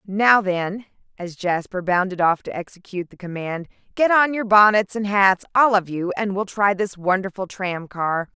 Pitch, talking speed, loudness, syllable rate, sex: 195 Hz, 185 wpm, -20 LUFS, 4.6 syllables/s, female